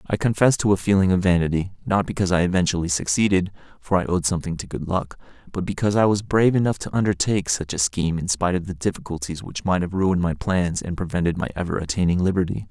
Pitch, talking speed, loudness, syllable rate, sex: 90 Hz, 210 wpm, -22 LUFS, 6.8 syllables/s, male